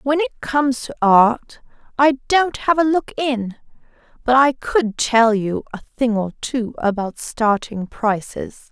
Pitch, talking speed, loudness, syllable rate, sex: 245 Hz, 160 wpm, -18 LUFS, 3.7 syllables/s, female